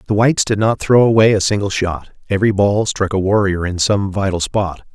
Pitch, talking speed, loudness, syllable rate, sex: 100 Hz, 220 wpm, -16 LUFS, 5.5 syllables/s, male